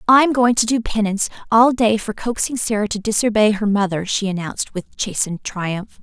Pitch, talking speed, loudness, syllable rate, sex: 215 Hz, 190 wpm, -18 LUFS, 5.5 syllables/s, female